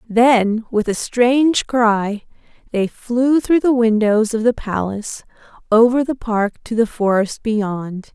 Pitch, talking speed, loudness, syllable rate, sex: 225 Hz, 145 wpm, -17 LUFS, 3.7 syllables/s, female